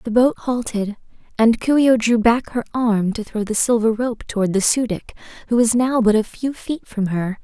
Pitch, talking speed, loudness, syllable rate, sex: 230 Hz, 235 wpm, -19 LUFS, 5.0 syllables/s, female